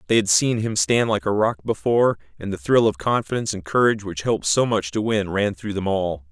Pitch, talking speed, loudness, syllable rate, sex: 100 Hz, 245 wpm, -21 LUFS, 5.7 syllables/s, male